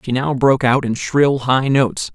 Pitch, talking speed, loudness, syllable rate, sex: 130 Hz, 225 wpm, -16 LUFS, 4.9 syllables/s, male